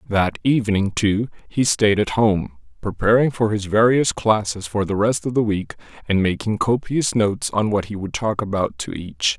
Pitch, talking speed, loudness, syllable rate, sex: 110 Hz, 190 wpm, -20 LUFS, 4.7 syllables/s, male